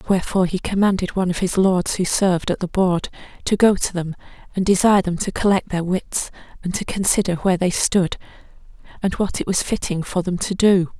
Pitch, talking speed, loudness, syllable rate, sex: 185 Hz, 205 wpm, -20 LUFS, 5.8 syllables/s, female